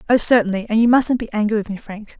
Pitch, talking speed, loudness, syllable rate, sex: 220 Hz, 245 wpm, -17 LUFS, 6.6 syllables/s, female